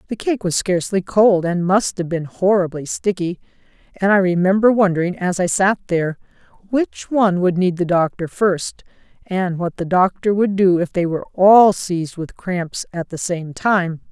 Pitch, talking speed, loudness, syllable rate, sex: 185 Hz, 180 wpm, -18 LUFS, 4.8 syllables/s, female